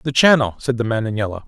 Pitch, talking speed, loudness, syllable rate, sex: 120 Hz, 285 wpm, -18 LUFS, 6.9 syllables/s, male